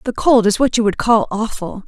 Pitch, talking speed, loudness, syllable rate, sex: 220 Hz, 255 wpm, -15 LUFS, 5.3 syllables/s, female